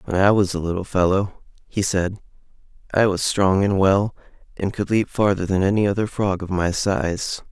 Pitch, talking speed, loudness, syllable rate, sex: 95 Hz, 190 wpm, -21 LUFS, 4.9 syllables/s, male